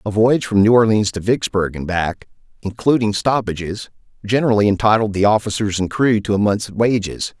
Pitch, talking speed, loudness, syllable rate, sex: 105 Hz, 170 wpm, -17 LUFS, 5.5 syllables/s, male